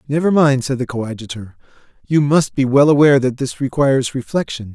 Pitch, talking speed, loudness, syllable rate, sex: 135 Hz, 175 wpm, -16 LUFS, 5.9 syllables/s, male